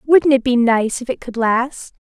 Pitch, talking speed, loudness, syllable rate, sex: 250 Hz, 225 wpm, -17 LUFS, 4.2 syllables/s, female